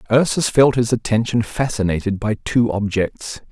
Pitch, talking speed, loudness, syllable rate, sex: 110 Hz, 135 wpm, -18 LUFS, 4.7 syllables/s, male